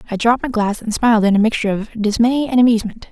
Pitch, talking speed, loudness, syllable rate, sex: 225 Hz, 250 wpm, -16 LUFS, 7.5 syllables/s, female